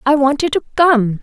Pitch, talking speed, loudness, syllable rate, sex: 270 Hz, 195 wpm, -14 LUFS, 5.2 syllables/s, female